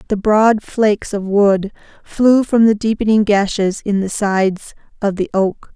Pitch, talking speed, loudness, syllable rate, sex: 205 Hz, 165 wpm, -15 LUFS, 4.3 syllables/s, female